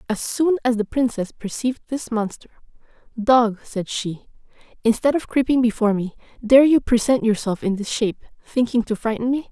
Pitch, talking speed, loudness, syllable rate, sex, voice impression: 230 Hz, 170 wpm, -20 LUFS, 5.4 syllables/s, female, very feminine, slightly young, slightly adult-like, very thin, slightly tensed, slightly weak, slightly bright, slightly soft, clear, fluent, cute, slightly intellectual, slightly refreshing, sincere, calm, friendly, reassuring, slightly unique, elegant, sweet, kind, slightly modest